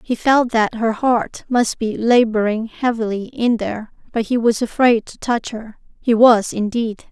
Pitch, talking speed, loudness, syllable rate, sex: 230 Hz, 175 wpm, -18 LUFS, 4.3 syllables/s, female